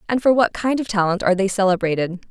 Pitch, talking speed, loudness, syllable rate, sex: 205 Hz, 235 wpm, -19 LUFS, 6.9 syllables/s, female